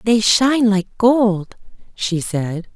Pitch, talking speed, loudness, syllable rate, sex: 210 Hz, 130 wpm, -17 LUFS, 3.2 syllables/s, female